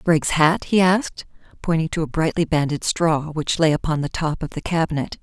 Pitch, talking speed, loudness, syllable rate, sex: 160 Hz, 205 wpm, -20 LUFS, 5.4 syllables/s, female